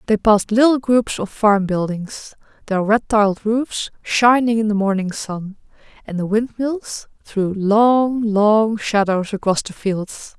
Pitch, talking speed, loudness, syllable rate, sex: 215 Hz, 150 wpm, -18 LUFS, 3.9 syllables/s, female